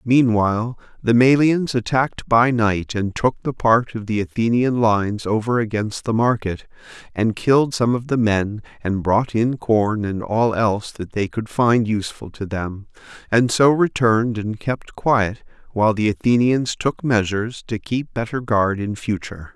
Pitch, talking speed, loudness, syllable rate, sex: 110 Hz, 170 wpm, -19 LUFS, 4.5 syllables/s, male